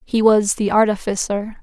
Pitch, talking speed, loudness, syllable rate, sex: 215 Hz, 150 wpm, -17 LUFS, 4.6 syllables/s, female